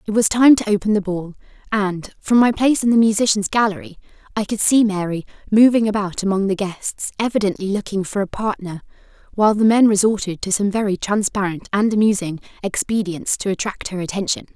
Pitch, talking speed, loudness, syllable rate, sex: 205 Hz, 180 wpm, -18 LUFS, 5.8 syllables/s, female